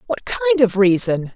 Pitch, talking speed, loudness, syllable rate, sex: 230 Hz, 175 wpm, -17 LUFS, 4.2 syllables/s, female